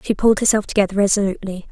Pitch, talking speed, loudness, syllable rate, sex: 200 Hz, 175 wpm, -17 LUFS, 8.2 syllables/s, female